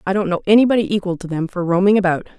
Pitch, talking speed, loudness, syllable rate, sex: 190 Hz, 250 wpm, -17 LUFS, 7.4 syllables/s, female